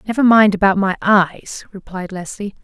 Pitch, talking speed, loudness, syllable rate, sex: 195 Hz, 160 wpm, -15 LUFS, 4.7 syllables/s, female